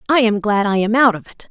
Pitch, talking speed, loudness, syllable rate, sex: 220 Hz, 320 wpm, -15 LUFS, 6.2 syllables/s, female